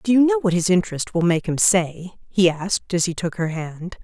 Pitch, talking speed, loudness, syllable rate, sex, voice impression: 185 Hz, 255 wpm, -20 LUFS, 5.2 syllables/s, female, feminine, middle-aged, slightly tensed, slightly hard, clear, fluent, raspy, intellectual, calm, elegant, lively, slightly strict, slightly sharp